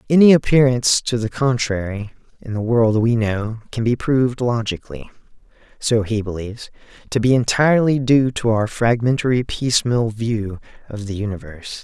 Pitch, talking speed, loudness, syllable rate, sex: 115 Hz, 135 wpm, -18 LUFS, 5.2 syllables/s, male